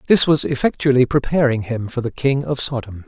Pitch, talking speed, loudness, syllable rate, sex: 130 Hz, 195 wpm, -18 LUFS, 5.5 syllables/s, male